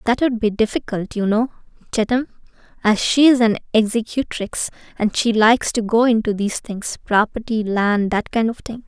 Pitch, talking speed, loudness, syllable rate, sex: 220 Hz, 170 wpm, -19 LUFS, 5.1 syllables/s, female